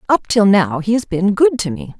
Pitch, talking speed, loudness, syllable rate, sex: 205 Hz, 270 wpm, -15 LUFS, 5.0 syllables/s, female